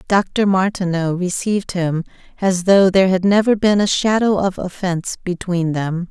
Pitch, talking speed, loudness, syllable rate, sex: 185 Hz, 155 wpm, -17 LUFS, 4.7 syllables/s, female